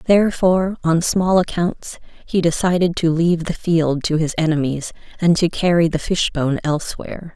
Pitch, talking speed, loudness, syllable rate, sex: 170 Hz, 155 wpm, -18 LUFS, 5.2 syllables/s, female